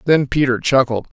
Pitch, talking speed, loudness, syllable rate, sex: 130 Hz, 150 wpm, -16 LUFS, 5.2 syllables/s, male